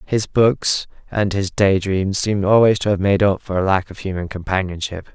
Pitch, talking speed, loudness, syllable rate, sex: 95 Hz, 210 wpm, -18 LUFS, 4.8 syllables/s, male